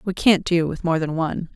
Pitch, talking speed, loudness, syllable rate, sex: 170 Hz, 270 wpm, -21 LUFS, 5.6 syllables/s, female